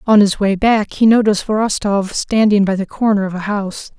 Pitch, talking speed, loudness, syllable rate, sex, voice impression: 205 Hz, 210 wpm, -15 LUFS, 5.3 syllables/s, female, feminine, slightly young, adult-like, slightly thin, tensed, powerful, bright, very hard, clear, fluent, cool, intellectual, slightly refreshing, sincere, very calm, slightly friendly, reassuring, unique, elegant, slightly sweet, slightly lively, slightly strict